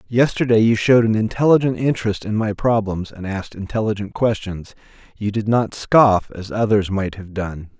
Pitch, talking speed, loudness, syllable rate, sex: 105 Hz, 170 wpm, -19 LUFS, 5.2 syllables/s, male